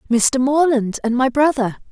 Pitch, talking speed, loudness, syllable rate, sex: 255 Hz, 155 wpm, -17 LUFS, 4.5 syllables/s, female